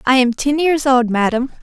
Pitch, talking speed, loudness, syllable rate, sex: 260 Hz, 220 wpm, -15 LUFS, 5.6 syllables/s, female